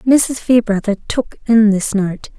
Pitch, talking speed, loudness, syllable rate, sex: 220 Hz, 150 wpm, -15 LUFS, 3.6 syllables/s, female